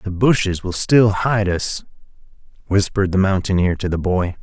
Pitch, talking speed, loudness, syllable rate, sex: 95 Hz, 165 wpm, -18 LUFS, 4.8 syllables/s, male